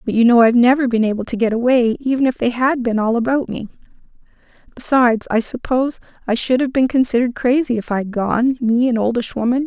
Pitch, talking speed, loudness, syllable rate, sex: 240 Hz, 215 wpm, -17 LUFS, 6.2 syllables/s, female